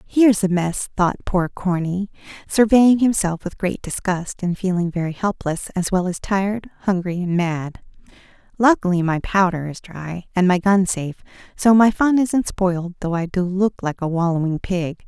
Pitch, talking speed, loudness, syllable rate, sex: 185 Hz, 175 wpm, -20 LUFS, 4.7 syllables/s, female